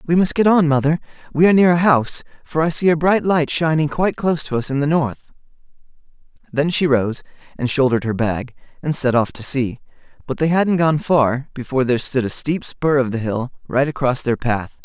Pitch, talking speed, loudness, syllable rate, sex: 145 Hz, 220 wpm, -18 LUFS, 5.8 syllables/s, male